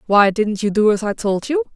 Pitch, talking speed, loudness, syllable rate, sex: 220 Hz, 275 wpm, -18 LUFS, 5.1 syllables/s, female